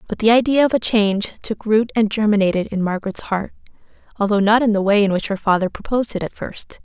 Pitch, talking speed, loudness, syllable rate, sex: 210 Hz, 230 wpm, -18 LUFS, 6.4 syllables/s, female